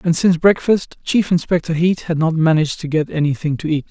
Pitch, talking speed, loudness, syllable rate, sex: 165 Hz, 215 wpm, -17 LUFS, 5.9 syllables/s, male